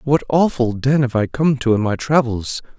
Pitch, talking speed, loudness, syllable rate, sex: 130 Hz, 215 wpm, -18 LUFS, 4.8 syllables/s, male